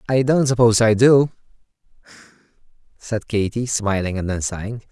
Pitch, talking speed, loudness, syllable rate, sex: 115 Hz, 135 wpm, -18 LUFS, 5.3 syllables/s, male